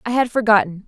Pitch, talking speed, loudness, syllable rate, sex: 220 Hz, 205 wpm, -17 LUFS, 6.5 syllables/s, female